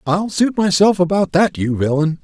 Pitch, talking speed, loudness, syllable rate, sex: 180 Hz, 190 wpm, -16 LUFS, 4.8 syllables/s, male